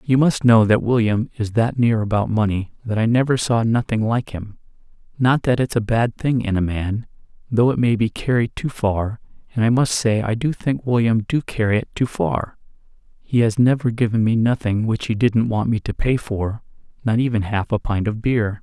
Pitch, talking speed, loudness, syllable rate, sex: 115 Hz, 215 wpm, -20 LUFS, 5.0 syllables/s, male